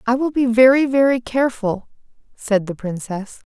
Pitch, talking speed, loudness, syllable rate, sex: 240 Hz, 150 wpm, -18 LUFS, 5.0 syllables/s, female